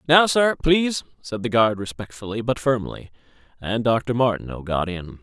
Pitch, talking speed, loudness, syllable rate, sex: 120 Hz, 160 wpm, -22 LUFS, 4.9 syllables/s, male